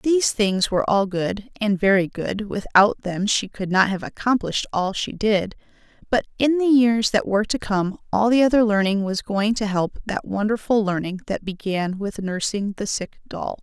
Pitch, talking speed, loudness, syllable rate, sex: 205 Hz, 195 wpm, -21 LUFS, 4.8 syllables/s, female